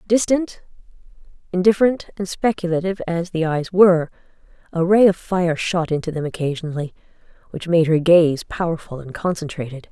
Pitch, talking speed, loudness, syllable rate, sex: 170 Hz, 140 wpm, -19 LUFS, 5.6 syllables/s, female